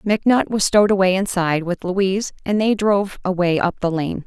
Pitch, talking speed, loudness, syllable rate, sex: 190 Hz, 195 wpm, -19 LUFS, 5.7 syllables/s, female